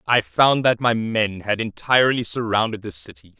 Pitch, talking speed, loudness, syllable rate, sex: 110 Hz, 175 wpm, -20 LUFS, 5.0 syllables/s, male